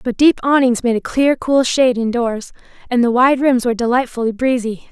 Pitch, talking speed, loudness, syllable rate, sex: 245 Hz, 195 wpm, -15 LUFS, 5.5 syllables/s, female